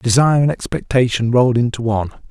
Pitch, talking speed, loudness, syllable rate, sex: 120 Hz, 155 wpm, -16 LUFS, 6.4 syllables/s, male